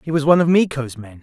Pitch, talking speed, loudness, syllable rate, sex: 145 Hz, 295 wpm, -17 LUFS, 7.1 syllables/s, male